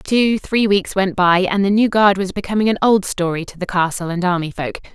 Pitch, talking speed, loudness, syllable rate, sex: 190 Hz, 245 wpm, -17 LUFS, 5.3 syllables/s, female